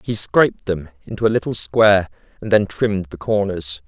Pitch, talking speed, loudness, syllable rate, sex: 100 Hz, 185 wpm, -18 LUFS, 5.5 syllables/s, male